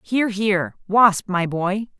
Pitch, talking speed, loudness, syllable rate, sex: 200 Hz, 150 wpm, -20 LUFS, 4.1 syllables/s, female